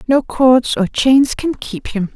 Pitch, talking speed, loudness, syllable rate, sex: 250 Hz, 195 wpm, -15 LUFS, 3.6 syllables/s, female